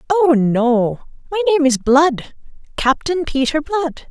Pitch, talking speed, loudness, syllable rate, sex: 290 Hz, 115 wpm, -16 LUFS, 3.8 syllables/s, female